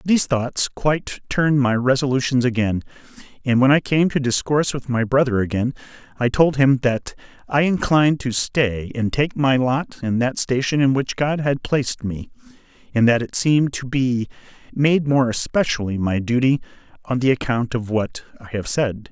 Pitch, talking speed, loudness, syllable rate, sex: 130 Hz, 180 wpm, -20 LUFS, 4.9 syllables/s, male